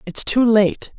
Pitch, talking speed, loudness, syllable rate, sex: 225 Hz, 185 wpm, -16 LUFS, 3.6 syllables/s, female